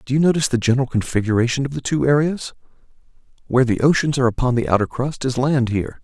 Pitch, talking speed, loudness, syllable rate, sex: 125 Hz, 210 wpm, -19 LUFS, 7.2 syllables/s, male